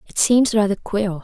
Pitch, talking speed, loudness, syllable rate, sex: 205 Hz, 195 wpm, -18 LUFS, 4.9 syllables/s, female